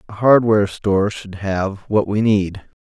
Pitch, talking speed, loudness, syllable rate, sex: 105 Hz, 170 wpm, -18 LUFS, 4.4 syllables/s, male